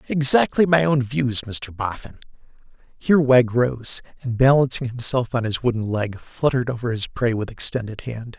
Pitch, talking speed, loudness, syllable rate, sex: 125 Hz, 165 wpm, -20 LUFS, 4.9 syllables/s, male